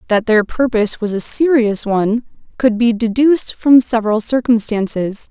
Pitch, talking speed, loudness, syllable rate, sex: 230 Hz, 145 wpm, -15 LUFS, 5.0 syllables/s, female